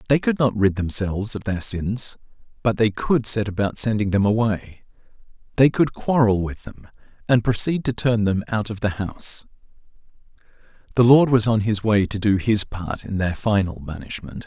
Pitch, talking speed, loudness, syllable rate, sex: 105 Hz, 185 wpm, -21 LUFS, 4.9 syllables/s, male